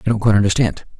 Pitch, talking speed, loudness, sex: 105 Hz, 240 wpm, -17 LUFS, male